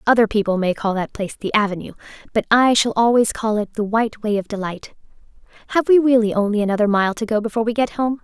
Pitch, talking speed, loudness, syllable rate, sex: 220 Hz, 225 wpm, -19 LUFS, 6.6 syllables/s, female